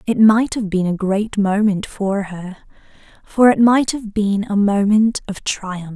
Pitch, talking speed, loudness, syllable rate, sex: 205 Hz, 180 wpm, -17 LUFS, 3.9 syllables/s, female